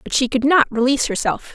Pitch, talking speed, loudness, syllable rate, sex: 255 Hz, 235 wpm, -18 LUFS, 6.0 syllables/s, female